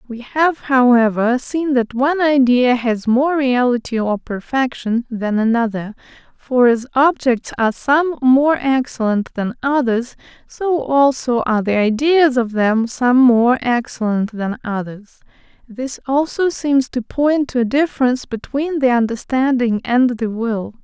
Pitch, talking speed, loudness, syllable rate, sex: 250 Hz, 140 wpm, -17 LUFS, 4.1 syllables/s, female